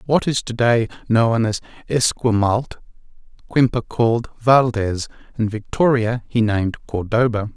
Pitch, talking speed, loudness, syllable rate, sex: 115 Hz, 120 wpm, -19 LUFS, 4.3 syllables/s, male